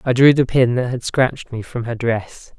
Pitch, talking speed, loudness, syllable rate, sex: 125 Hz, 255 wpm, -18 LUFS, 4.9 syllables/s, male